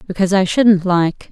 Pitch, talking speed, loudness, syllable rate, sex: 190 Hz, 180 wpm, -14 LUFS, 6.1 syllables/s, female